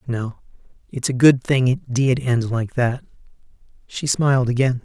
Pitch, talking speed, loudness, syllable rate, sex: 125 Hz, 160 wpm, -19 LUFS, 4.6 syllables/s, male